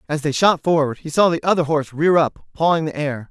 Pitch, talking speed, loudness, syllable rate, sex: 155 Hz, 255 wpm, -18 LUFS, 6.0 syllables/s, male